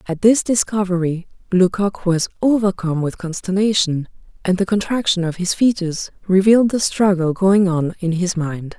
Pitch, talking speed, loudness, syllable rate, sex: 185 Hz, 150 wpm, -18 LUFS, 5.1 syllables/s, female